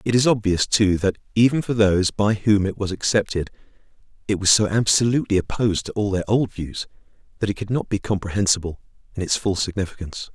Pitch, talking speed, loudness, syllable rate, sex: 100 Hz, 190 wpm, -21 LUFS, 6.2 syllables/s, male